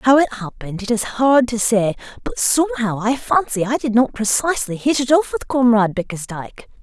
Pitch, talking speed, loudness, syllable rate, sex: 240 Hz, 195 wpm, -18 LUFS, 5.5 syllables/s, female